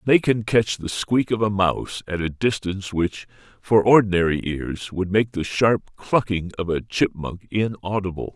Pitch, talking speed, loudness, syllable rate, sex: 100 Hz, 170 wpm, -22 LUFS, 4.6 syllables/s, male